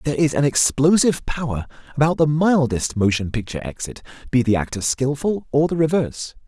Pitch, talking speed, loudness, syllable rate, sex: 140 Hz, 165 wpm, -20 LUFS, 5.9 syllables/s, male